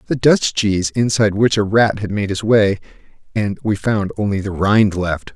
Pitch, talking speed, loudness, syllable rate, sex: 105 Hz, 200 wpm, -17 LUFS, 4.9 syllables/s, male